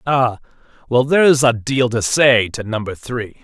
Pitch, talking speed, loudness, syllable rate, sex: 120 Hz, 175 wpm, -16 LUFS, 4.3 syllables/s, male